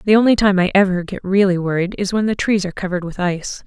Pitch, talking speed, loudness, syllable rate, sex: 190 Hz, 260 wpm, -17 LUFS, 6.9 syllables/s, female